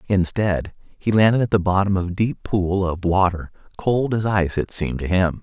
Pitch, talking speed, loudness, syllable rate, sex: 95 Hz, 210 wpm, -20 LUFS, 5.2 syllables/s, male